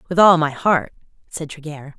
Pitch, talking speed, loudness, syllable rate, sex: 155 Hz, 180 wpm, -16 LUFS, 4.8 syllables/s, female